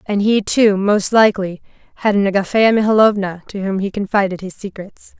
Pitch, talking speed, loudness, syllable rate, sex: 200 Hz, 175 wpm, -16 LUFS, 5.4 syllables/s, female